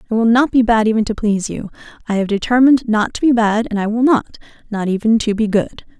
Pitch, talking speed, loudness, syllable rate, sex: 225 Hz, 240 wpm, -15 LUFS, 6.3 syllables/s, female